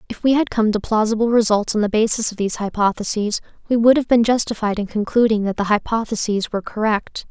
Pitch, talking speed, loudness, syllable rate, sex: 215 Hz, 205 wpm, -19 LUFS, 6.2 syllables/s, female